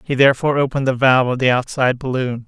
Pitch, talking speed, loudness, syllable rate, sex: 130 Hz, 220 wpm, -17 LUFS, 7.6 syllables/s, male